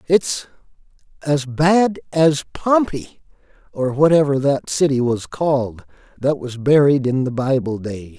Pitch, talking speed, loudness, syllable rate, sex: 140 Hz, 130 wpm, -18 LUFS, 4.0 syllables/s, male